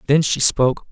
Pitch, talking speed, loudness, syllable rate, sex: 135 Hz, 195 wpm, -16 LUFS, 5.6 syllables/s, male